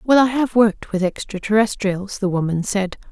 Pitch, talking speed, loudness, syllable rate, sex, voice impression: 205 Hz, 175 wpm, -19 LUFS, 5.2 syllables/s, female, very feminine, slightly young, thin, tensed, slightly powerful, slightly dark, slightly soft, very clear, fluent, raspy, cool, intellectual, slightly refreshing, sincere, calm, slightly friendly, reassuring, slightly unique, elegant, wild, slightly sweet, lively, strict, slightly intense, sharp, light